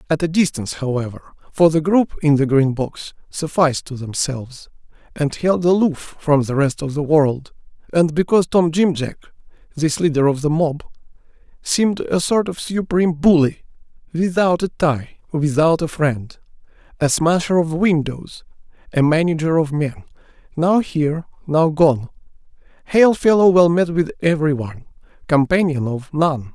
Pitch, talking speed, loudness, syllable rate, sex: 155 Hz, 150 wpm, -18 LUFS, 4.9 syllables/s, male